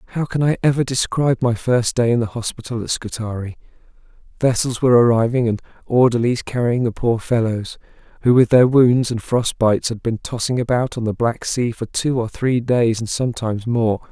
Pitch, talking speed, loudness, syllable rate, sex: 120 Hz, 190 wpm, -18 LUFS, 5.4 syllables/s, male